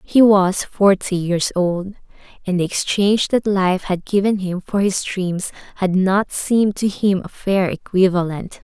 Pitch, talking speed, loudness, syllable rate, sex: 190 Hz, 165 wpm, -18 LUFS, 4.2 syllables/s, female